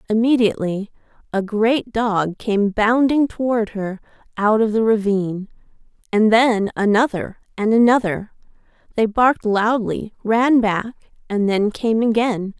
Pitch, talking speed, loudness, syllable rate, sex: 220 Hz, 125 wpm, -18 LUFS, 4.3 syllables/s, female